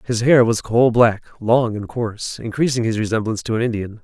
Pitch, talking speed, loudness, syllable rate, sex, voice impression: 115 Hz, 210 wpm, -18 LUFS, 5.7 syllables/s, male, masculine, adult-like, slightly fluent, slightly cool, sincere, calm